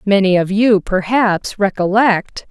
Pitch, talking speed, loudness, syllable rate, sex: 200 Hz, 120 wpm, -15 LUFS, 3.8 syllables/s, female